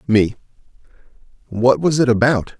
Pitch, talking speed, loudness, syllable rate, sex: 120 Hz, 115 wpm, -16 LUFS, 4.6 syllables/s, male